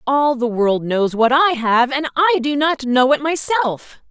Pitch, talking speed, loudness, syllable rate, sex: 270 Hz, 205 wpm, -17 LUFS, 4.1 syllables/s, female